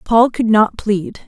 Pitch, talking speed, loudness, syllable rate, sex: 215 Hz, 190 wpm, -15 LUFS, 3.5 syllables/s, female